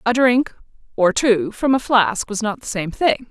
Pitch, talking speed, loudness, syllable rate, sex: 225 Hz, 220 wpm, -18 LUFS, 4.7 syllables/s, female